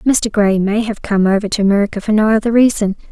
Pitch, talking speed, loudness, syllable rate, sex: 210 Hz, 230 wpm, -14 LUFS, 6.1 syllables/s, female